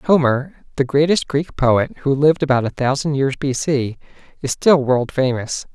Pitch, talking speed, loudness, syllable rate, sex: 140 Hz, 175 wpm, -18 LUFS, 4.6 syllables/s, male